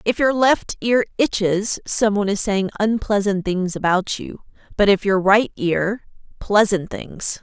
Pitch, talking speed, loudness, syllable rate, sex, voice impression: 205 Hz, 160 wpm, -19 LUFS, 4.1 syllables/s, female, very feminine, adult-like, clear, slightly intellectual, slightly lively